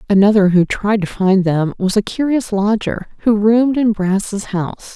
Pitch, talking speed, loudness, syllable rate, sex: 205 Hz, 180 wpm, -16 LUFS, 4.6 syllables/s, female